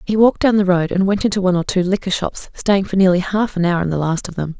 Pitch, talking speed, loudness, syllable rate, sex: 185 Hz, 315 wpm, -17 LUFS, 6.5 syllables/s, female